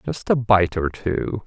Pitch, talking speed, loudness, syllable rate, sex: 100 Hz, 205 wpm, -21 LUFS, 3.7 syllables/s, male